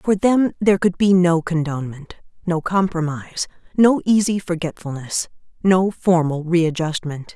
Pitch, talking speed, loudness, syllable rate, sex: 175 Hz, 120 wpm, -19 LUFS, 4.7 syllables/s, female